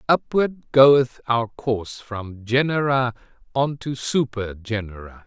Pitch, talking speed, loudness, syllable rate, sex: 120 Hz, 115 wpm, -21 LUFS, 3.7 syllables/s, male